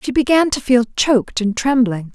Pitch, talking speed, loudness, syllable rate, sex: 245 Hz, 195 wpm, -16 LUFS, 5.2 syllables/s, female